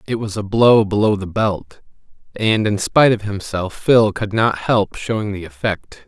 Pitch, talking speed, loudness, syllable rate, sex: 105 Hz, 190 wpm, -17 LUFS, 4.4 syllables/s, male